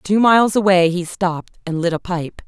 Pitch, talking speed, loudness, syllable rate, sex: 185 Hz, 220 wpm, -17 LUFS, 5.1 syllables/s, female